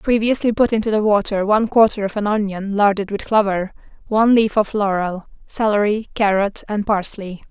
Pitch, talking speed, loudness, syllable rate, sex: 205 Hz, 170 wpm, -18 LUFS, 5.3 syllables/s, female